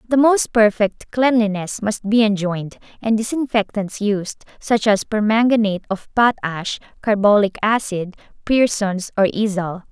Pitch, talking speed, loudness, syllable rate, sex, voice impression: 210 Hz, 120 wpm, -18 LUFS, 4.4 syllables/s, female, feminine, slightly young, cute, slightly refreshing, friendly